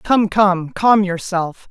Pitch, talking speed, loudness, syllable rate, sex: 190 Hz, 140 wpm, -16 LUFS, 3.0 syllables/s, female